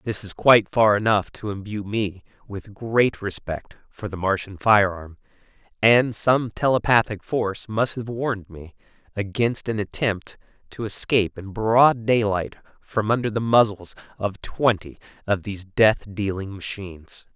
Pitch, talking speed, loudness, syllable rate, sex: 105 Hz, 145 wpm, -22 LUFS, 4.4 syllables/s, male